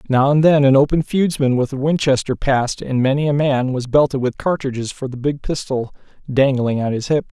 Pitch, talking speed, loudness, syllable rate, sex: 135 Hz, 210 wpm, -18 LUFS, 5.5 syllables/s, male